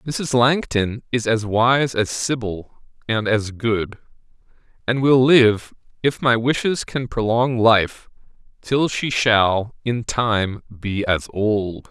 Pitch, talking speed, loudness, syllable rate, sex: 115 Hz, 135 wpm, -19 LUFS, 3.2 syllables/s, male